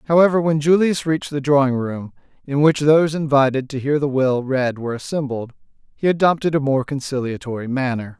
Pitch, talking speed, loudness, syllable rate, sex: 140 Hz, 175 wpm, -19 LUFS, 5.8 syllables/s, male